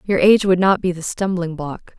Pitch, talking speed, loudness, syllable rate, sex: 180 Hz, 240 wpm, -17 LUFS, 5.4 syllables/s, female